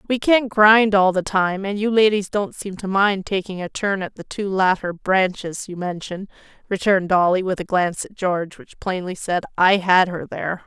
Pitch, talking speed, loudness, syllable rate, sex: 190 Hz, 210 wpm, -20 LUFS, 4.9 syllables/s, female